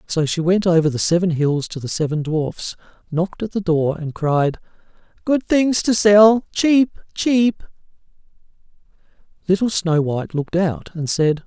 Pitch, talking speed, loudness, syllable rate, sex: 175 Hz, 155 wpm, -18 LUFS, 4.4 syllables/s, male